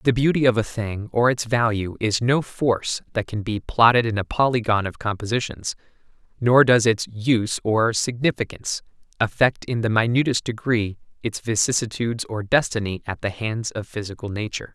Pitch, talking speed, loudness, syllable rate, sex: 115 Hz, 165 wpm, -22 LUFS, 5.2 syllables/s, male